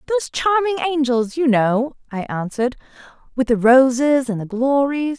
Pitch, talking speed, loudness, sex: 265 Hz, 150 wpm, -18 LUFS, female